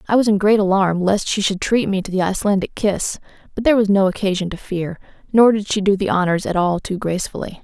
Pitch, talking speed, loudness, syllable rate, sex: 195 Hz, 245 wpm, -18 LUFS, 6.2 syllables/s, female